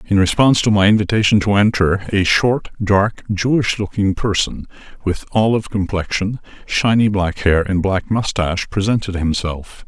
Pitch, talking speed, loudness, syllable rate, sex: 100 Hz, 145 wpm, -17 LUFS, 4.9 syllables/s, male